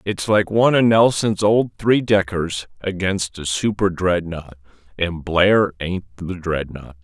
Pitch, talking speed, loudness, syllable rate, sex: 95 Hz, 145 wpm, -19 LUFS, 3.9 syllables/s, male